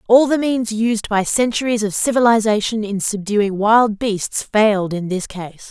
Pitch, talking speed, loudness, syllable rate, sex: 215 Hz, 170 wpm, -17 LUFS, 4.3 syllables/s, female